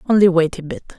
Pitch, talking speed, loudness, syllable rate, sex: 180 Hz, 245 wpm, -16 LUFS, 6.5 syllables/s, female